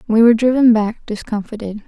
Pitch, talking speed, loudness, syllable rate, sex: 225 Hz, 160 wpm, -15 LUFS, 6.1 syllables/s, female